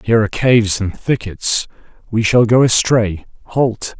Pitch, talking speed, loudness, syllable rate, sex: 110 Hz, 135 wpm, -15 LUFS, 4.7 syllables/s, male